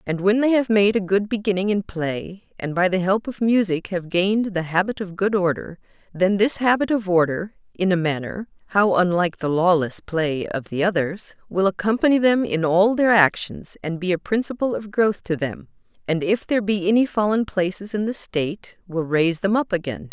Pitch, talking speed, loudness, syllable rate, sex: 190 Hz, 205 wpm, -21 LUFS, 5.2 syllables/s, female